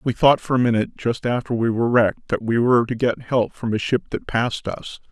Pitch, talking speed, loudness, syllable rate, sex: 120 Hz, 260 wpm, -21 LUFS, 6.0 syllables/s, male